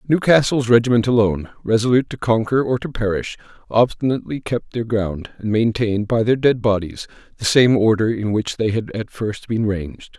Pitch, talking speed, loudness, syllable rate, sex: 115 Hz, 175 wpm, -19 LUFS, 5.5 syllables/s, male